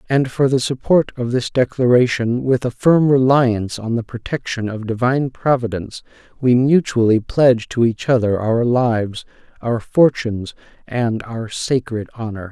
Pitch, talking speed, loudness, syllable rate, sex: 120 Hz, 150 wpm, -18 LUFS, 4.7 syllables/s, male